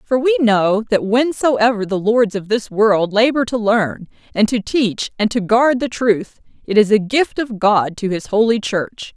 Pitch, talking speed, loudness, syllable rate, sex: 220 Hz, 205 wpm, -16 LUFS, 4.2 syllables/s, female